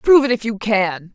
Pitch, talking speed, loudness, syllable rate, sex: 220 Hz, 265 wpm, -17 LUFS, 5.7 syllables/s, female